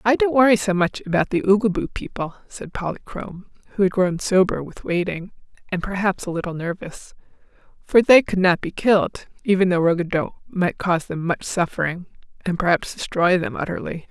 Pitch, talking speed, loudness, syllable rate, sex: 185 Hz, 175 wpm, -21 LUFS, 5.4 syllables/s, female